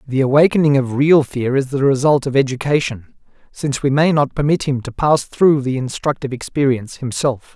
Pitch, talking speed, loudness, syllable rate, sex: 135 Hz, 185 wpm, -17 LUFS, 5.5 syllables/s, male